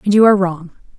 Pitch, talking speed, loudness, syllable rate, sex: 190 Hz, 245 wpm, -13 LUFS, 7.7 syllables/s, female